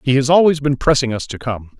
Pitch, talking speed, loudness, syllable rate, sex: 130 Hz, 265 wpm, -16 LUFS, 5.9 syllables/s, male